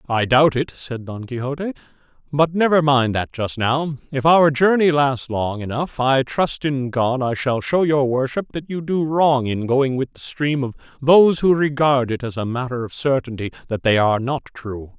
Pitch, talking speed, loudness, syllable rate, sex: 135 Hz, 205 wpm, -19 LUFS, 4.7 syllables/s, male